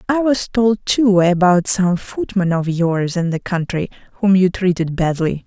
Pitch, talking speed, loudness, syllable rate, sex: 190 Hz, 175 wpm, -17 LUFS, 4.2 syllables/s, female